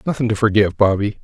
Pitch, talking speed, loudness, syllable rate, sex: 105 Hz, 195 wpm, -17 LUFS, 7.3 syllables/s, male